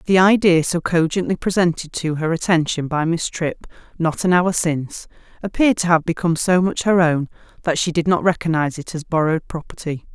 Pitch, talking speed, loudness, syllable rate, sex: 170 Hz, 190 wpm, -19 LUFS, 5.7 syllables/s, female